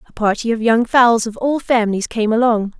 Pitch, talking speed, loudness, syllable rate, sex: 230 Hz, 215 wpm, -16 LUFS, 5.4 syllables/s, female